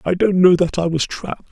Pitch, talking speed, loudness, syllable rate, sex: 175 Hz, 275 wpm, -16 LUFS, 5.8 syllables/s, male